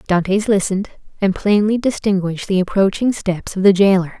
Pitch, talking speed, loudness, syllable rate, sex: 195 Hz, 155 wpm, -17 LUFS, 5.6 syllables/s, female